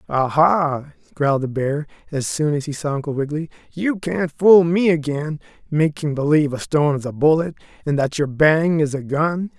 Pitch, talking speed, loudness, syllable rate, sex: 150 Hz, 195 wpm, -19 LUFS, 5.1 syllables/s, male